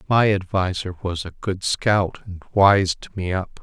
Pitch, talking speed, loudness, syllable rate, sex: 95 Hz, 165 wpm, -21 LUFS, 4.1 syllables/s, male